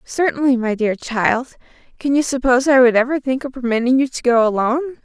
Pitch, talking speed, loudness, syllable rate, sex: 255 Hz, 200 wpm, -17 LUFS, 6.1 syllables/s, female